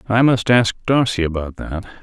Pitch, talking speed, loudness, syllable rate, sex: 105 Hz, 180 wpm, -18 LUFS, 4.7 syllables/s, male